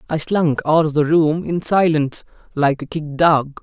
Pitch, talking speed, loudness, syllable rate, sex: 155 Hz, 200 wpm, -17 LUFS, 4.9 syllables/s, male